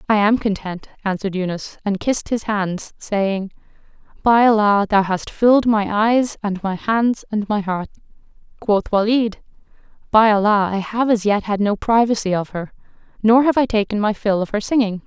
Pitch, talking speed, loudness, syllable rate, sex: 210 Hz, 180 wpm, -18 LUFS, 4.9 syllables/s, female